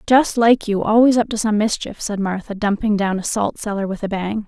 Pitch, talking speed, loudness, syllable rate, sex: 210 Hz, 240 wpm, -18 LUFS, 5.3 syllables/s, female